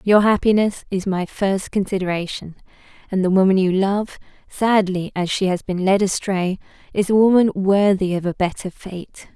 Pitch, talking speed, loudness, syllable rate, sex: 195 Hz, 165 wpm, -19 LUFS, 4.1 syllables/s, female